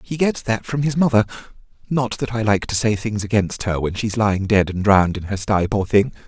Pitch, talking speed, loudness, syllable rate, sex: 110 Hz, 240 wpm, -19 LUFS, 5.6 syllables/s, male